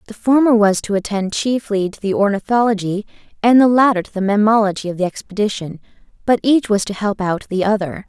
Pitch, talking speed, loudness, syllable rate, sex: 210 Hz, 195 wpm, -17 LUFS, 5.9 syllables/s, female